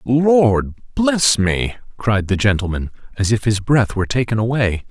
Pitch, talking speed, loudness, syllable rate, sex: 115 Hz, 160 wpm, -17 LUFS, 4.1 syllables/s, male